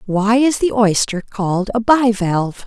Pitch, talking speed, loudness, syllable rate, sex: 215 Hz, 180 wpm, -16 LUFS, 4.5 syllables/s, female